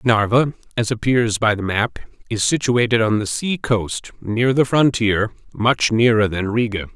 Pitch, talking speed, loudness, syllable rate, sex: 115 Hz, 155 wpm, -18 LUFS, 4.4 syllables/s, male